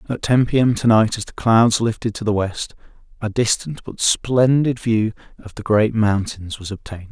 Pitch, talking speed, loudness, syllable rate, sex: 110 Hz, 200 wpm, -18 LUFS, 4.9 syllables/s, male